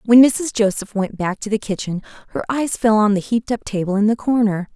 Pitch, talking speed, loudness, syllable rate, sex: 215 Hz, 240 wpm, -19 LUFS, 5.8 syllables/s, female